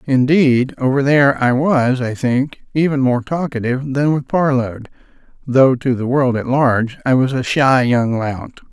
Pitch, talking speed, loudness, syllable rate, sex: 130 Hz, 170 wpm, -16 LUFS, 4.5 syllables/s, male